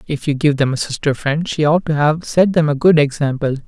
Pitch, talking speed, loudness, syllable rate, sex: 150 Hz, 260 wpm, -16 LUFS, 5.6 syllables/s, male